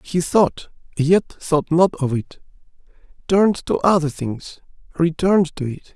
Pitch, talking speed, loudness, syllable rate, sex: 165 Hz, 130 wpm, -19 LUFS, 4.1 syllables/s, male